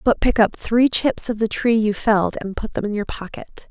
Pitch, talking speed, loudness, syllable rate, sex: 220 Hz, 260 wpm, -20 LUFS, 5.0 syllables/s, female